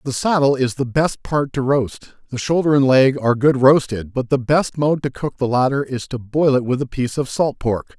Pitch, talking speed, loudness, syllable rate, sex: 135 Hz, 240 wpm, -18 LUFS, 5.1 syllables/s, male